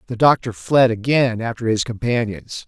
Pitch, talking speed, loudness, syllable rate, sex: 120 Hz, 155 wpm, -18 LUFS, 4.9 syllables/s, male